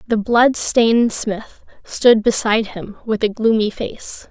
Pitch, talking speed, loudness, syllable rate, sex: 220 Hz, 155 wpm, -16 LUFS, 3.8 syllables/s, female